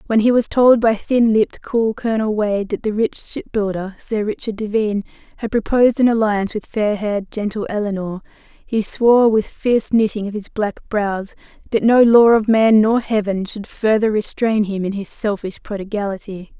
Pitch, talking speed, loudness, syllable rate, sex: 215 Hz, 180 wpm, -18 LUFS, 5.1 syllables/s, female